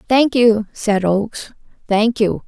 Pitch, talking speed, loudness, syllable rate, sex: 220 Hz, 145 wpm, -16 LUFS, 3.7 syllables/s, female